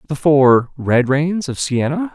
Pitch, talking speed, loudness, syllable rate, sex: 145 Hz, 170 wpm, -16 LUFS, 3.7 syllables/s, male